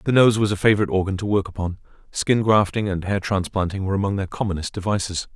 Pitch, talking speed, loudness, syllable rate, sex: 100 Hz, 215 wpm, -22 LUFS, 6.8 syllables/s, male